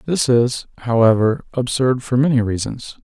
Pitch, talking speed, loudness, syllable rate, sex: 125 Hz, 135 wpm, -18 LUFS, 4.7 syllables/s, male